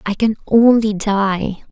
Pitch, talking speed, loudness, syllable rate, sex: 210 Hz, 140 wpm, -15 LUFS, 3.6 syllables/s, female